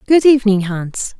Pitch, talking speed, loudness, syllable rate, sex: 225 Hz, 150 wpm, -14 LUFS, 4.9 syllables/s, female